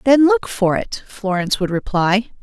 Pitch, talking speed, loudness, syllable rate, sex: 215 Hz, 175 wpm, -18 LUFS, 4.6 syllables/s, female